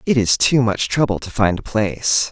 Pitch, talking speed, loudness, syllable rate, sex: 115 Hz, 235 wpm, -17 LUFS, 5.0 syllables/s, male